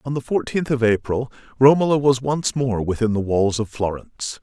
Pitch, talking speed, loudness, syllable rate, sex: 125 Hz, 190 wpm, -20 LUFS, 5.2 syllables/s, male